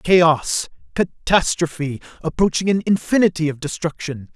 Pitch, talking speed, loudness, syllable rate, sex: 165 Hz, 95 wpm, -20 LUFS, 4.5 syllables/s, male